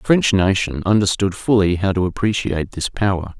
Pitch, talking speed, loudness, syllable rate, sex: 95 Hz, 175 wpm, -18 LUFS, 5.5 syllables/s, male